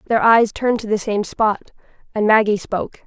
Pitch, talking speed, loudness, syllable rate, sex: 215 Hz, 195 wpm, -18 LUFS, 5.5 syllables/s, female